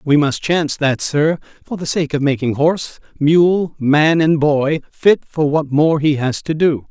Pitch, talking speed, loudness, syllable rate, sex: 150 Hz, 200 wpm, -16 LUFS, 4.2 syllables/s, male